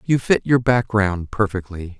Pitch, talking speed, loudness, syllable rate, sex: 105 Hz, 150 wpm, -19 LUFS, 4.2 syllables/s, male